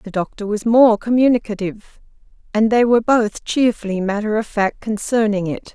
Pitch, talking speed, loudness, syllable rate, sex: 215 Hz, 155 wpm, -17 LUFS, 5.2 syllables/s, female